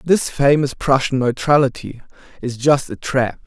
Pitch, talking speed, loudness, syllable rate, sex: 135 Hz, 140 wpm, -17 LUFS, 4.5 syllables/s, male